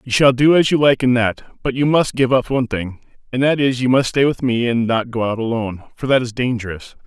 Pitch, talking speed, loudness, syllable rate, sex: 125 Hz, 270 wpm, -17 LUFS, 5.8 syllables/s, male